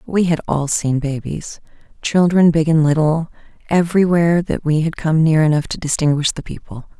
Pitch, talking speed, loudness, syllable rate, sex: 160 Hz, 170 wpm, -17 LUFS, 5.2 syllables/s, female